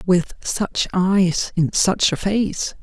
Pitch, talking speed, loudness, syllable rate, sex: 190 Hz, 150 wpm, -19 LUFS, 2.8 syllables/s, female